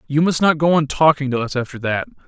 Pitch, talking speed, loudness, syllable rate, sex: 145 Hz, 265 wpm, -18 LUFS, 6.2 syllables/s, male